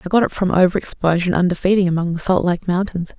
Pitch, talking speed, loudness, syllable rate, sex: 180 Hz, 265 wpm, -18 LUFS, 7.2 syllables/s, female